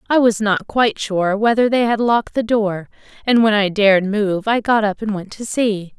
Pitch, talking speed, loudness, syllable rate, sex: 215 Hz, 230 wpm, -17 LUFS, 5.0 syllables/s, female